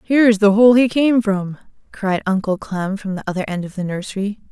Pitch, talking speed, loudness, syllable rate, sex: 205 Hz, 225 wpm, -17 LUFS, 5.6 syllables/s, female